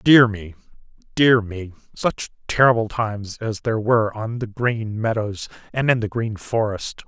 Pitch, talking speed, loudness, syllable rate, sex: 110 Hz, 160 wpm, -21 LUFS, 4.5 syllables/s, male